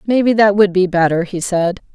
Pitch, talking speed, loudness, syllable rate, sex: 190 Hz, 215 wpm, -14 LUFS, 5.3 syllables/s, female